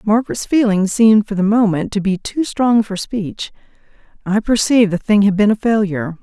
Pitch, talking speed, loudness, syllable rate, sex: 210 Hz, 195 wpm, -15 LUFS, 5.4 syllables/s, female